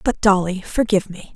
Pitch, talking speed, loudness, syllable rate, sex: 195 Hz, 180 wpm, -19 LUFS, 5.6 syllables/s, female